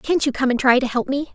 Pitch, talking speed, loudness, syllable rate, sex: 265 Hz, 355 wpm, -19 LUFS, 6.1 syllables/s, female